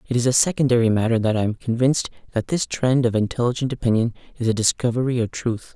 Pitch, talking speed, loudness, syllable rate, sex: 120 Hz, 210 wpm, -21 LUFS, 6.6 syllables/s, male